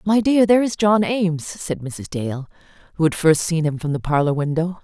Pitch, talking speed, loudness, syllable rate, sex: 170 Hz, 225 wpm, -19 LUFS, 5.3 syllables/s, female